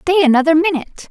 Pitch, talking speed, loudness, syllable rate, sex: 320 Hz, 165 wpm, -13 LUFS, 6.5 syllables/s, female